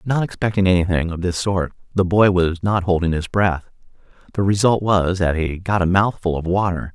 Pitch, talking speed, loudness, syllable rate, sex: 95 Hz, 200 wpm, -19 LUFS, 5.2 syllables/s, male